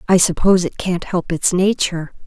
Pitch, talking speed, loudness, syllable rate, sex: 180 Hz, 185 wpm, -17 LUFS, 5.5 syllables/s, female